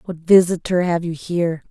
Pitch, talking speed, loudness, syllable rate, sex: 170 Hz, 175 wpm, -18 LUFS, 5.3 syllables/s, female